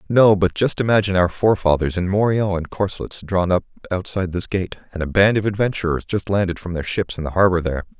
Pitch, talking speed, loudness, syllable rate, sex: 95 Hz, 220 wpm, -20 LUFS, 6.9 syllables/s, male